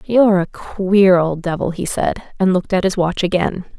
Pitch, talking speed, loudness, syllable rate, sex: 185 Hz, 205 wpm, -17 LUFS, 5.0 syllables/s, female